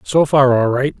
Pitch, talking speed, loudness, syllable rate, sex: 135 Hz, 240 wpm, -14 LUFS, 4.5 syllables/s, male